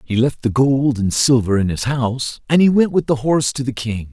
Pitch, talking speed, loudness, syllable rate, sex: 125 Hz, 260 wpm, -17 LUFS, 5.3 syllables/s, male